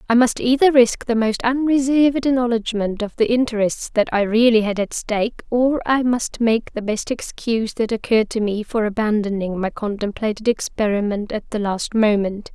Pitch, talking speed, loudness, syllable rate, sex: 225 Hz, 175 wpm, -19 LUFS, 5.1 syllables/s, female